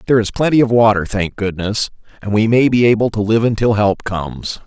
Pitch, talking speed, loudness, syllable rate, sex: 110 Hz, 220 wpm, -15 LUFS, 5.8 syllables/s, male